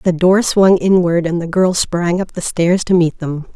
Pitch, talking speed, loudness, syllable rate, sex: 175 Hz, 235 wpm, -14 LUFS, 4.4 syllables/s, female